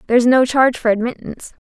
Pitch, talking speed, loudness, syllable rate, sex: 245 Hz, 180 wpm, -15 LUFS, 7.3 syllables/s, female